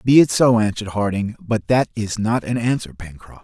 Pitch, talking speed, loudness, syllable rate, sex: 110 Hz, 210 wpm, -19 LUFS, 5.3 syllables/s, male